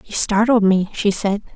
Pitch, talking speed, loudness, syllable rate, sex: 205 Hz, 195 wpm, -17 LUFS, 4.6 syllables/s, female